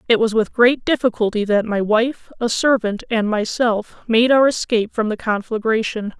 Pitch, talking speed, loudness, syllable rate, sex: 225 Hz, 175 wpm, -18 LUFS, 4.8 syllables/s, female